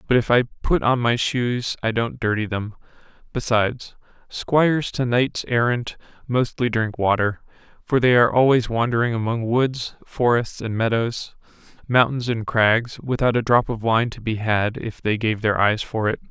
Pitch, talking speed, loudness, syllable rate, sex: 115 Hz, 175 wpm, -21 LUFS, 4.6 syllables/s, male